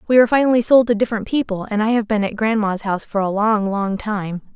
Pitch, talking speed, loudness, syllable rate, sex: 215 Hz, 250 wpm, -18 LUFS, 6.3 syllables/s, female